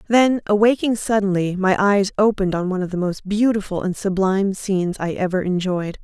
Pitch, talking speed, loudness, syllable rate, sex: 195 Hz, 180 wpm, -19 LUFS, 5.7 syllables/s, female